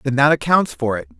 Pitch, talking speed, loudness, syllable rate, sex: 125 Hz, 250 wpm, -17 LUFS, 6.0 syllables/s, male